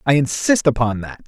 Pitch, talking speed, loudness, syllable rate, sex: 135 Hz, 190 wpm, -18 LUFS, 5.2 syllables/s, male